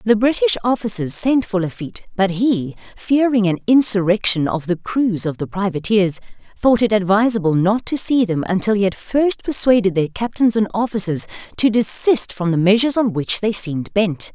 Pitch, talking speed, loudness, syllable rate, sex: 205 Hz, 180 wpm, -17 LUFS, 5.1 syllables/s, female